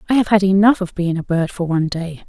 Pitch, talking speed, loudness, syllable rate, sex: 185 Hz, 290 wpm, -17 LUFS, 6.5 syllables/s, female